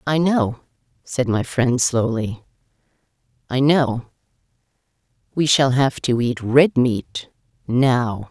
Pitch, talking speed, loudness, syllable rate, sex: 125 Hz, 100 wpm, -19 LUFS, 3.4 syllables/s, female